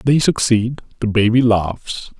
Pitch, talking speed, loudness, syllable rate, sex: 115 Hz, 135 wpm, -17 LUFS, 3.8 syllables/s, male